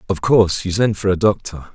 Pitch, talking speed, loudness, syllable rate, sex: 95 Hz, 240 wpm, -17 LUFS, 5.8 syllables/s, male